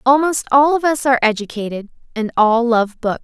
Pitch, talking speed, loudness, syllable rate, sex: 250 Hz, 185 wpm, -16 LUFS, 5.4 syllables/s, female